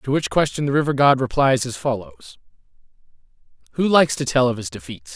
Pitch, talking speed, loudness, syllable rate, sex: 135 Hz, 185 wpm, -19 LUFS, 6.0 syllables/s, male